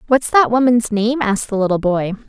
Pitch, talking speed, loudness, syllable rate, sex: 225 Hz, 210 wpm, -16 LUFS, 5.6 syllables/s, female